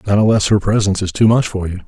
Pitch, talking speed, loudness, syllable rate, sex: 100 Hz, 290 wpm, -15 LUFS, 7.1 syllables/s, male